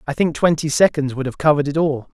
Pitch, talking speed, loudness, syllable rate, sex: 150 Hz, 245 wpm, -18 LUFS, 6.5 syllables/s, male